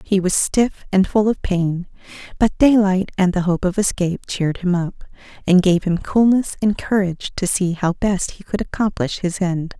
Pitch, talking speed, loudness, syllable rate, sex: 190 Hz, 195 wpm, -19 LUFS, 4.9 syllables/s, female